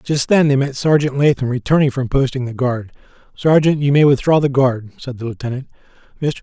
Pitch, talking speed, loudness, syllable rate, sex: 135 Hz, 195 wpm, -16 LUFS, 5.7 syllables/s, male